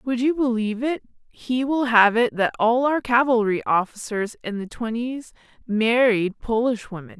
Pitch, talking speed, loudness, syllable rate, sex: 235 Hz, 160 wpm, -21 LUFS, 4.5 syllables/s, female